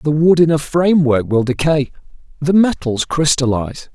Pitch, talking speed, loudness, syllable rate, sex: 150 Hz, 150 wpm, -15 LUFS, 5.1 syllables/s, male